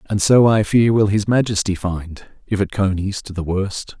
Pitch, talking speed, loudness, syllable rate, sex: 100 Hz, 195 wpm, -18 LUFS, 4.5 syllables/s, male